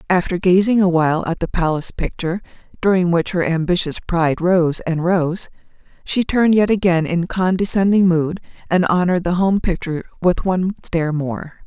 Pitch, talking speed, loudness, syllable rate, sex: 175 Hz, 165 wpm, -18 LUFS, 5.6 syllables/s, female